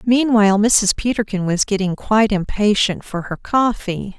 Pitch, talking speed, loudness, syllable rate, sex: 210 Hz, 145 wpm, -17 LUFS, 4.7 syllables/s, female